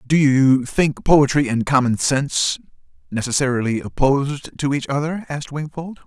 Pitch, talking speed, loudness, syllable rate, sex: 140 Hz, 140 wpm, -19 LUFS, 4.8 syllables/s, male